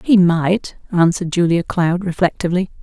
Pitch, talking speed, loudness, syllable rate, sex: 175 Hz, 125 wpm, -17 LUFS, 5.2 syllables/s, female